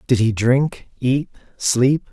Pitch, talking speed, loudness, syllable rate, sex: 130 Hz, 140 wpm, -19 LUFS, 3.1 syllables/s, male